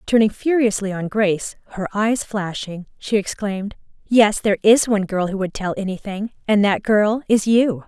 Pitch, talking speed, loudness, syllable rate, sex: 205 Hz, 175 wpm, -19 LUFS, 5.0 syllables/s, female